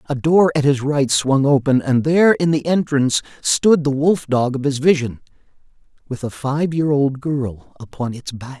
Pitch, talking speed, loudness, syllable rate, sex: 140 Hz, 195 wpm, -17 LUFS, 4.7 syllables/s, male